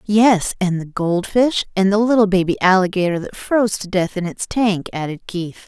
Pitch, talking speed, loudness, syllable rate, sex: 195 Hz, 200 wpm, -18 LUFS, 4.9 syllables/s, female